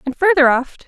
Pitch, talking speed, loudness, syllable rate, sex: 300 Hz, 205 wpm, -14 LUFS, 5.3 syllables/s, female